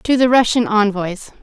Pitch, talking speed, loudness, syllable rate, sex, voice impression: 220 Hz, 170 wpm, -15 LUFS, 4.6 syllables/s, female, very feminine, gender-neutral, slightly young, slightly adult-like, thin, very tensed, powerful, bright, very hard, very clear, very fluent, cute, intellectual, very refreshing, very sincere, very calm, very friendly, very reassuring, very unique, elegant, slightly wild, sweet, very lively, strict, intense, slightly sharp